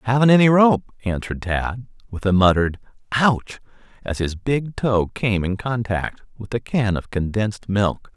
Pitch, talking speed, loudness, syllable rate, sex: 110 Hz, 160 wpm, -20 LUFS, 4.6 syllables/s, male